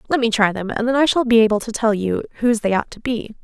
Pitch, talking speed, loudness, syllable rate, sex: 230 Hz, 315 wpm, -18 LUFS, 6.7 syllables/s, female